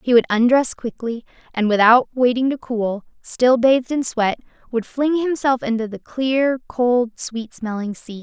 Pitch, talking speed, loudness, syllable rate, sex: 240 Hz, 170 wpm, -19 LUFS, 4.3 syllables/s, female